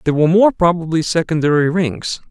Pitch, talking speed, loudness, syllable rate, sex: 165 Hz, 155 wpm, -15 LUFS, 5.6 syllables/s, male